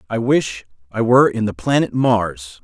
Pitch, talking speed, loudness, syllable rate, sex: 120 Hz, 180 wpm, -17 LUFS, 4.7 syllables/s, male